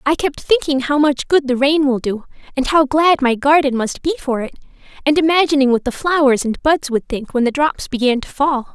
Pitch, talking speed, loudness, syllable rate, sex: 280 Hz, 235 wpm, -16 LUFS, 5.3 syllables/s, female